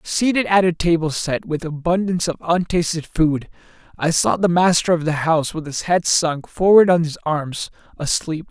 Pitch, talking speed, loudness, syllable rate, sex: 165 Hz, 185 wpm, -19 LUFS, 4.9 syllables/s, male